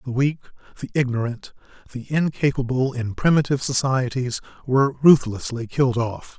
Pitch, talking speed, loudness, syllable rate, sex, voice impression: 130 Hz, 120 wpm, -21 LUFS, 5.3 syllables/s, male, very masculine, slightly middle-aged, thick, cool, sincere, slightly wild